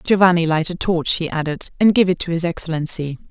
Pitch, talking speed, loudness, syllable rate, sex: 170 Hz, 220 wpm, -18 LUFS, 5.9 syllables/s, female